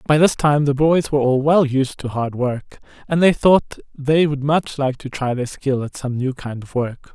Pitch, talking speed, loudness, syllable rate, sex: 140 Hz, 245 wpm, -19 LUFS, 4.6 syllables/s, male